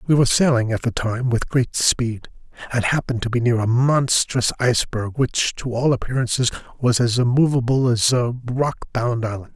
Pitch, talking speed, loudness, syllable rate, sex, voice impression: 120 Hz, 175 wpm, -20 LUFS, 5.0 syllables/s, male, masculine, middle-aged, powerful, hard, raspy, calm, mature, slightly friendly, wild, lively, strict, slightly intense